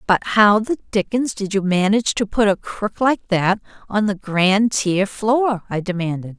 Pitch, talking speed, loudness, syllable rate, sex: 205 Hz, 190 wpm, -19 LUFS, 4.2 syllables/s, female